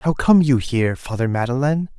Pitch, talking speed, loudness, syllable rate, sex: 135 Hz, 180 wpm, -18 LUFS, 5.8 syllables/s, male